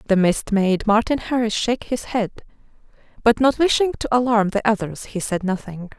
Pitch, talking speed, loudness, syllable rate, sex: 220 Hz, 180 wpm, -20 LUFS, 5.3 syllables/s, female